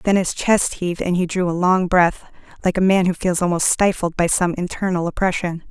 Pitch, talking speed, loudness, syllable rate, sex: 180 Hz, 220 wpm, -19 LUFS, 5.5 syllables/s, female